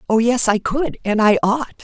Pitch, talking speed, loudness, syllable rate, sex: 235 Hz, 230 wpm, -17 LUFS, 4.7 syllables/s, female